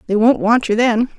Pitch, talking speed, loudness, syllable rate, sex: 230 Hz, 255 wpm, -15 LUFS, 5.3 syllables/s, female